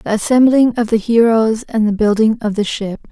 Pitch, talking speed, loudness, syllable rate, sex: 225 Hz, 210 wpm, -14 LUFS, 5.2 syllables/s, female